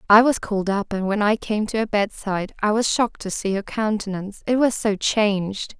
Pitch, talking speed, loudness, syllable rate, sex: 210 Hz, 215 wpm, -22 LUFS, 5.5 syllables/s, female